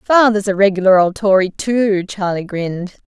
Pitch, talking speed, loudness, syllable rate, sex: 195 Hz, 155 wpm, -15 LUFS, 4.8 syllables/s, female